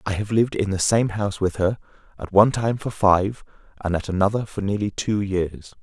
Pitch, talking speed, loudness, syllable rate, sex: 100 Hz, 215 wpm, -22 LUFS, 5.5 syllables/s, male